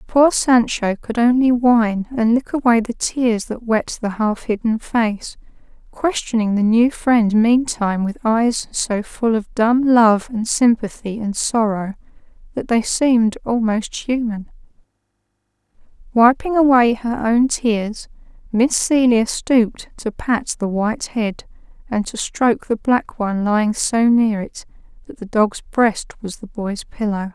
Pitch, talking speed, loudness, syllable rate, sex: 230 Hz, 150 wpm, -18 LUFS, 4.1 syllables/s, female